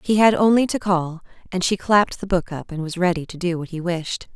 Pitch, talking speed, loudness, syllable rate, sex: 180 Hz, 260 wpm, -21 LUFS, 5.6 syllables/s, female